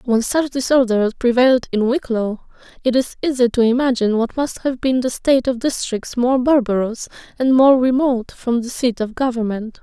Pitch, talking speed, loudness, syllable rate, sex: 245 Hz, 175 wpm, -18 LUFS, 5.2 syllables/s, female